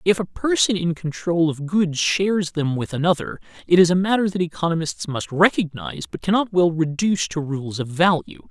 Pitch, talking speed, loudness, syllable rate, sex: 165 Hz, 190 wpm, -21 LUFS, 5.3 syllables/s, male